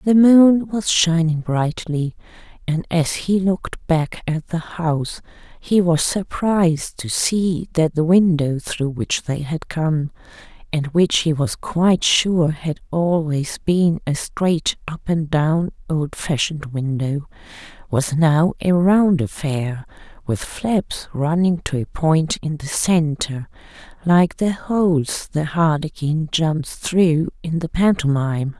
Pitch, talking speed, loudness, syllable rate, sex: 165 Hz, 140 wpm, -19 LUFS, 3.6 syllables/s, female